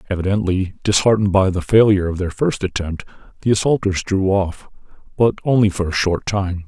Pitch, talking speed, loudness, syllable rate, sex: 95 Hz, 170 wpm, -18 LUFS, 5.8 syllables/s, male